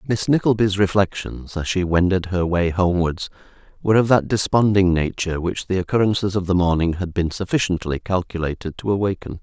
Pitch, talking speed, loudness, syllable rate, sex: 95 Hz, 165 wpm, -20 LUFS, 5.7 syllables/s, male